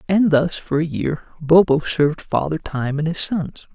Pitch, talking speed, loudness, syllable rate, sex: 160 Hz, 190 wpm, -19 LUFS, 4.5 syllables/s, male